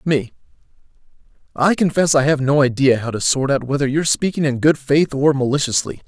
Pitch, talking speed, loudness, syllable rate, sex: 140 Hz, 190 wpm, -17 LUFS, 5.7 syllables/s, male